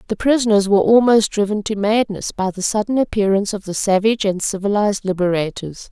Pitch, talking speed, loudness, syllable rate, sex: 205 Hz, 175 wpm, -17 LUFS, 6.1 syllables/s, female